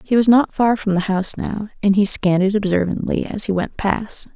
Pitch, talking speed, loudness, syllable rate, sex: 205 Hz, 235 wpm, -18 LUFS, 5.4 syllables/s, female